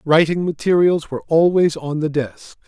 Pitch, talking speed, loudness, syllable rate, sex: 160 Hz, 155 wpm, -17 LUFS, 4.8 syllables/s, male